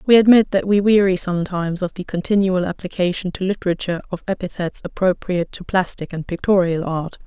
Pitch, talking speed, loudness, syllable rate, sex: 185 Hz, 165 wpm, -19 LUFS, 6.1 syllables/s, female